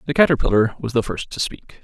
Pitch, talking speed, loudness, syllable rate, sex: 125 Hz, 230 wpm, -20 LUFS, 6.1 syllables/s, male